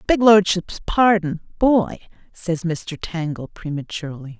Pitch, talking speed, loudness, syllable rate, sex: 180 Hz, 80 wpm, -20 LUFS, 4.3 syllables/s, female